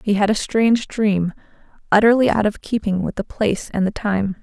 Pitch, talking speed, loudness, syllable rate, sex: 210 Hz, 205 wpm, -19 LUFS, 5.4 syllables/s, female